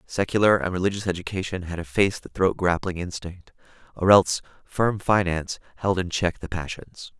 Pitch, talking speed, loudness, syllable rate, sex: 90 Hz, 160 wpm, -24 LUFS, 5.5 syllables/s, male